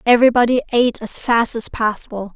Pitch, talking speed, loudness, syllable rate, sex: 230 Hz, 155 wpm, -17 LUFS, 6.2 syllables/s, female